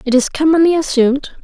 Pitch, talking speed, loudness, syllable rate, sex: 290 Hz, 170 wpm, -13 LUFS, 6.6 syllables/s, female